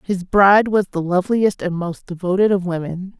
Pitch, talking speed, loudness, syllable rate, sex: 185 Hz, 190 wpm, -18 LUFS, 5.4 syllables/s, female